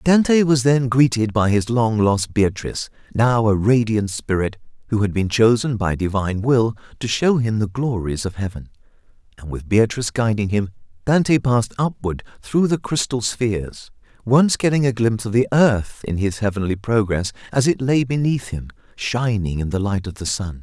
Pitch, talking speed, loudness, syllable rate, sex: 115 Hz, 180 wpm, -19 LUFS, 5.0 syllables/s, male